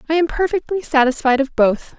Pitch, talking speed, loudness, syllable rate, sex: 295 Hz, 180 wpm, -17 LUFS, 5.6 syllables/s, female